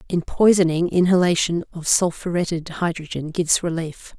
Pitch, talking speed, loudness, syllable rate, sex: 170 Hz, 115 wpm, -20 LUFS, 5.1 syllables/s, female